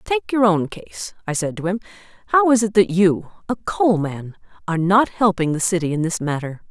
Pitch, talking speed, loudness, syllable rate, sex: 190 Hz, 215 wpm, -19 LUFS, 5.1 syllables/s, female